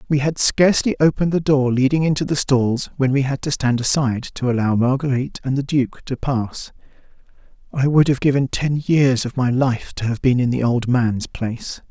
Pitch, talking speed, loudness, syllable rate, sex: 135 Hz, 205 wpm, -19 LUFS, 5.2 syllables/s, male